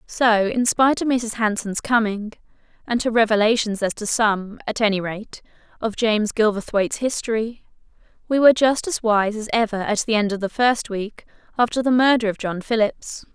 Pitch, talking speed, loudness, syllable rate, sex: 220 Hz, 180 wpm, -20 LUFS, 5.2 syllables/s, female